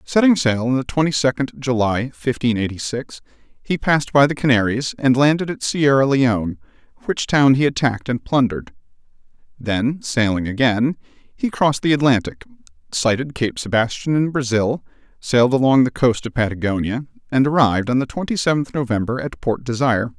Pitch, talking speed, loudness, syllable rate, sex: 125 Hz, 165 wpm, -19 LUFS, 5.4 syllables/s, male